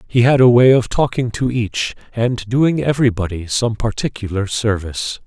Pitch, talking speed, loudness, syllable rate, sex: 115 Hz, 160 wpm, -17 LUFS, 4.9 syllables/s, male